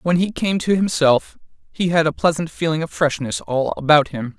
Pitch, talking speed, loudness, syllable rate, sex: 160 Hz, 205 wpm, -19 LUFS, 5.0 syllables/s, male